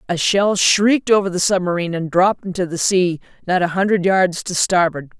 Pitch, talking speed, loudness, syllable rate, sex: 185 Hz, 195 wpm, -17 LUFS, 5.5 syllables/s, female